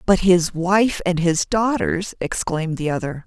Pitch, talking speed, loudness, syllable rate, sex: 180 Hz, 165 wpm, -20 LUFS, 4.3 syllables/s, female